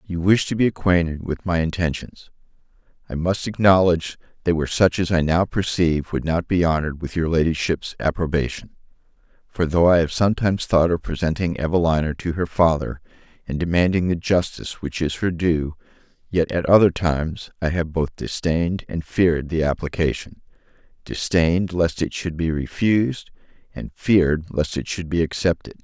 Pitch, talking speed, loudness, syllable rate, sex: 85 Hz, 165 wpm, -21 LUFS, 5.4 syllables/s, male